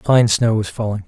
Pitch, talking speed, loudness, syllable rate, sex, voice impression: 110 Hz, 225 wpm, -17 LUFS, 4.9 syllables/s, male, very masculine, very middle-aged, very thick, tensed, slightly powerful, slightly bright, soft, muffled, slightly fluent, cool, intellectual, slightly refreshing, sincere, calm, mature, slightly friendly, reassuring, unique, slightly elegant, wild, slightly sweet, lively, slightly strict, slightly intense, slightly modest